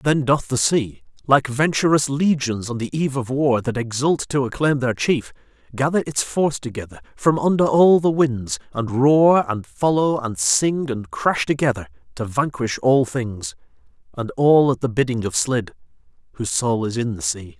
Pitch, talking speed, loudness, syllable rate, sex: 130 Hz, 175 wpm, -20 LUFS, 4.7 syllables/s, male